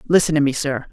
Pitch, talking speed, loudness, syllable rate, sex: 145 Hz, 260 wpm, -18 LUFS, 6.7 syllables/s, male